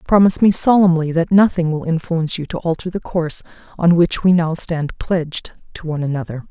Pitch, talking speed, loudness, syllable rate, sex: 170 Hz, 195 wpm, -17 LUFS, 5.9 syllables/s, female